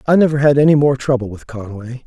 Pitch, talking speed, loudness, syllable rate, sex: 130 Hz, 235 wpm, -14 LUFS, 6.2 syllables/s, male